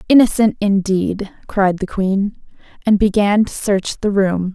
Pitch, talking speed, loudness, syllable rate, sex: 200 Hz, 145 wpm, -17 LUFS, 4.0 syllables/s, female